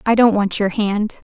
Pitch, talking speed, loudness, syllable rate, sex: 210 Hz, 230 wpm, -17 LUFS, 4.6 syllables/s, female